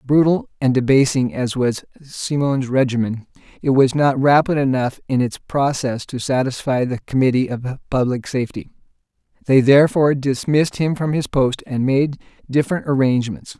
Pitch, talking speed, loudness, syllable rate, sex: 135 Hz, 145 wpm, -18 LUFS, 5.1 syllables/s, male